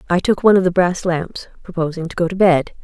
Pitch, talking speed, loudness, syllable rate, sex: 175 Hz, 255 wpm, -17 LUFS, 6.2 syllables/s, female